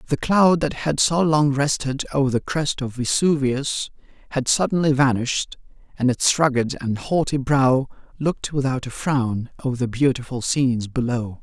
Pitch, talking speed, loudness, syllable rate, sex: 135 Hz, 160 wpm, -21 LUFS, 4.8 syllables/s, male